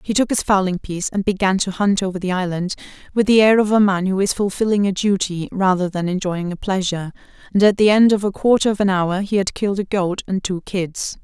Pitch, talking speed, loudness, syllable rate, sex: 195 Hz, 245 wpm, -18 LUFS, 5.9 syllables/s, female